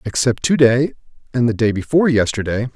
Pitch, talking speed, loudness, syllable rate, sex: 125 Hz, 175 wpm, -17 LUFS, 6.0 syllables/s, male